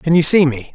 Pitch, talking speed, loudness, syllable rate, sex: 155 Hz, 325 wpm, -14 LUFS, 5.6 syllables/s, male